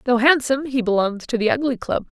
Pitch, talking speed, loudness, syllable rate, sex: 245 Hz, 220 wpm, -20 LUFS, 6.6 syllables/s, female